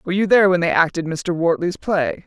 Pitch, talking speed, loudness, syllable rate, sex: 180 Hz, 240 wpm, -18 LUFS, 5.8 syllables/s, female